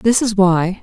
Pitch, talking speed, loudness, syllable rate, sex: 205 Hz, 220 wpm, -15 LUFS, 3.8 syllables/s, female